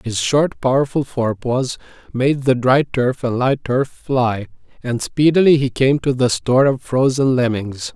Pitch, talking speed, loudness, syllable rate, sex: 130 Hz, 165 wpm, -17 LUFS, 4.3 syllables/s, male